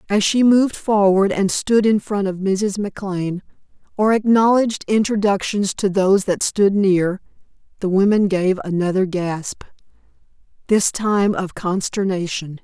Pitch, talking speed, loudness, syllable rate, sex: 195 Hz, 135 wpm, -18 LUFS, 4.5 syllables/s, female